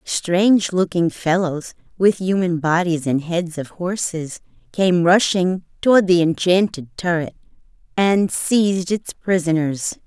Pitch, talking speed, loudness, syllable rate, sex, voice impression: 180 Hz, 120 wpm, -19 LUFS, 3.9 syllables/s, female, very feminine, slightly gender-neutral, very adult-like, middle-aged, very thin, very tensed, powerful, very bright, soft, very clear, fluent, nasal, cute, slightly intellectual, refreshing, sincere, very calm, friendly, slightly reassuring, very unique, very elegant, wild, sweet, very lively, slightly intense, sharp, light